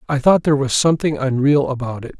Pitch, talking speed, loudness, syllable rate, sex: 140 Hz, 220 wpm, -17 LUFS, 6.5 syllables/s, male